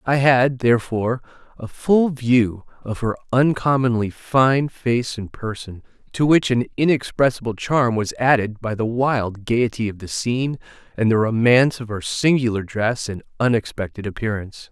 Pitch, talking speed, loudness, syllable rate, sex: 120 Hz, 150 wpm, -20 LUFS, 4.7 syllables/s, male